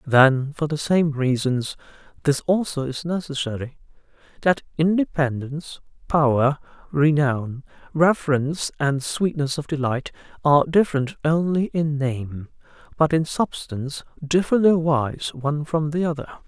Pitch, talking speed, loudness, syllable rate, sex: 150 Hz, 115 wpm, -22 LUFS, 4.5 syllables/s, male